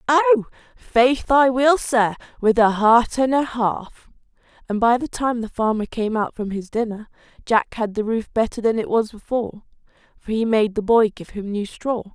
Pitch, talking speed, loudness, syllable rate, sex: 230 Hz, 200 wpm, -20 LUFS, 4.5 syllables/s, female